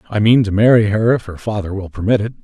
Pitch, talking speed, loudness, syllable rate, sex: 105 Hz, 270 wpm, -15 LUFS, 6.5 syllables/s, male